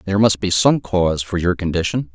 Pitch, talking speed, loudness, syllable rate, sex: 95 Hz, 225 wpm, -18 LUFS, 6.0 syllables/s, male